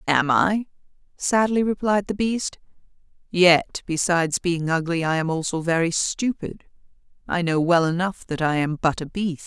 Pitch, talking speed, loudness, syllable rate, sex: 175 Hz, 160 wpm, -22 LUFS, 4.5 syllables/s, female